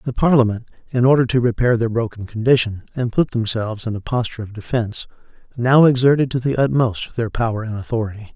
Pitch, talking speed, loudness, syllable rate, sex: 120 Hz, 185 wpm, -19 LUFS, 6.2 syllables/s, male